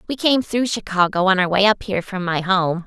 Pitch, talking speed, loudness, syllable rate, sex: 195 Hz, 250 wpm, -18 LUFS, 5.6 syllables/s, female